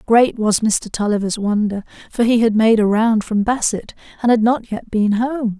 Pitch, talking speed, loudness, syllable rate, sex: 220 Hz, 205 wpm, -17 LUFS, 4.7 syllables/s, female